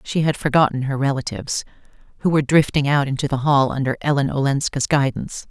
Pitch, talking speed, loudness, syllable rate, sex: 140 Hz, 175 wpm, -20 LUFS, 6.3 syllables/s, female